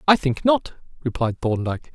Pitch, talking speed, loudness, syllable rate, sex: 145 Hz, 155 wpm, -22 LUFS, 5.1 syllables/s, male